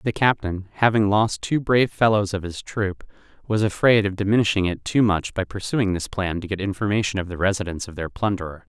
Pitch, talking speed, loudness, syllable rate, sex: 100 Hz, 205 wpm, -22 LUFS, 5.8 syllables/s, male